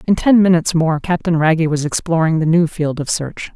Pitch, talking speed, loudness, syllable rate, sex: 165 Hz, 220 wpm, -15 LUFS, 5.5 syllables/s, female